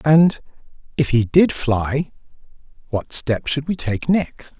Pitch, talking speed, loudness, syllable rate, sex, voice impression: 135 Hz, 145 wpm, -19 LUFS, 3.5 syllables/s, male, very masculine, middle-aged, tensed, slightly powerful, bright, soft, clear, fluent, slightly raspy, cool, intellectual, refreshing, sincere, calm, very mature, friendly, reassuring, very unique, slightly elegant, wild, sweet, slightly lively, kind, slightly modest